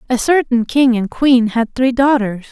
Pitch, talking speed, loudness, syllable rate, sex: 245 Hz, 190 wpm, -14 LUFS, 4.4 syllables/s, female